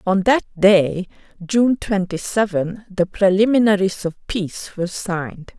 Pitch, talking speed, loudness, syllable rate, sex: 195 Hz, 130 wpm, -19 LUFS, 4.3 syllables/s, female